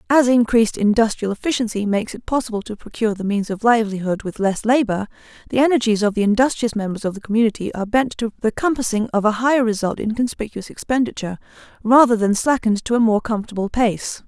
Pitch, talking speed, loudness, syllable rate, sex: 225 Hz, 190 wpm, -19 LUFS, 6.6 syllables/s, female